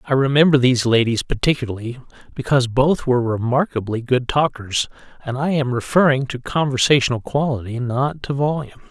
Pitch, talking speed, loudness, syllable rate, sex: 130 Hz, 135 wpm, -19 LUFS, 5.7 syllables/s, male